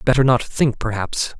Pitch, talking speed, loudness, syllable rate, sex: 120 Hz, 170 wpm, -19 LUFS, 4.8 syllables/s, male